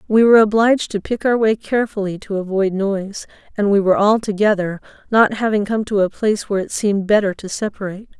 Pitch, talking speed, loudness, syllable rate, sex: 205 Hz, 205 wpm, -17 LUFS, 6.4 syllables/s, female